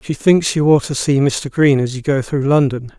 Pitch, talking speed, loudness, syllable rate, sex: 140 Hz, 260 wpm, -15 LUFS, 4.9 syllables/s, male